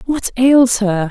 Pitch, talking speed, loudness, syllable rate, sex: 235 Hz, 160 wpm, -13 LUFS, 3.2 syllables/s, female